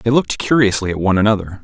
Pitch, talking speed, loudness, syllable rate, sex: 105 Hz, 220 wpm, -16 LUFS, 7.6 syllables/s, male